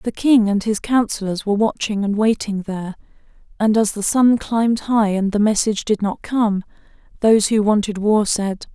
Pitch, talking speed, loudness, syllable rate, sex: 210 Hz, 185 wpm, -18 LUFS, 5.1 syllables/s, female